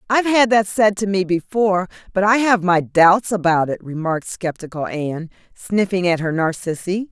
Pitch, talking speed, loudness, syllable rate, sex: 190 Hz, 175 wpm, -18 LUFS, 5.1 syllables/s, female